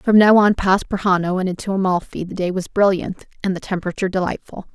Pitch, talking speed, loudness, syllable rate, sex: 190 Hz, 200 wpm, -19 LUFS, 6.3 syllables/s, female